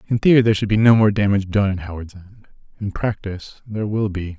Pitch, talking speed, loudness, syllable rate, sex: 100 Hz, 230 wpm, -18 LUFS, 6.4 syllables/s, male